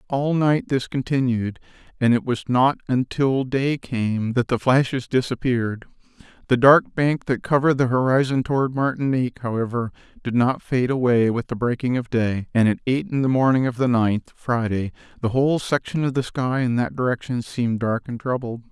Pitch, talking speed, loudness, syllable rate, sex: 125 Hz, 185 wpm, -21 LUFS, 5.3 syllables/s, male